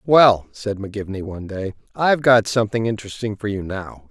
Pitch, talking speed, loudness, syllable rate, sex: 105 Hz, 175 wpm, -20 LUFS, 5.9 syllables/s, male